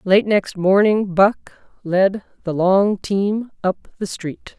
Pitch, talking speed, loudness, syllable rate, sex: 195 Hz, 145 wpm, -18 LUFS, 3.3 syllables/s, female